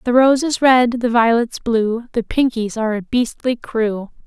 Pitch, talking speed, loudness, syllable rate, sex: 235 Hz, 185 wpm, -17 LUFS, 4.3 syllables/s, female